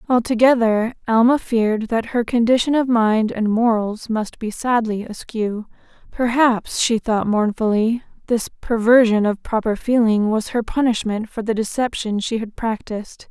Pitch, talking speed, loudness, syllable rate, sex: 225 Hz, 145 wpm, -19 LUFS, 4.5 syllables/s, female